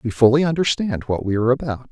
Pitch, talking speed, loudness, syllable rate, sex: 130 Hz, 220 wpm, -19 LUFS, 6.5 syllables/s, male